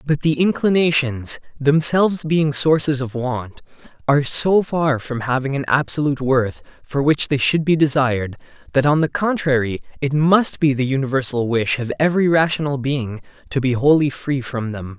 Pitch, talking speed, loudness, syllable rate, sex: 140 Hz, 170 wpm, -18 LUFS, 5.0 syllables/s, male